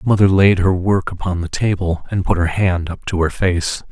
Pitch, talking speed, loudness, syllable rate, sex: 90 Hz, 245 wpm, -17 LUFS, 5.2 syllables/s, male